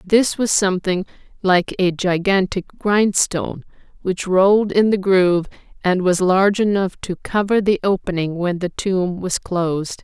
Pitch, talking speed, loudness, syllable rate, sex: 190 Hz, 150 wpm, -18 LUFS, 4.4 syllables/s, female